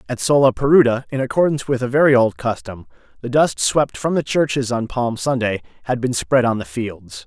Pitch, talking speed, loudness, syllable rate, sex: 125 Hz, 200 wpm, -18 LUFS, 5.5 syllables/s, male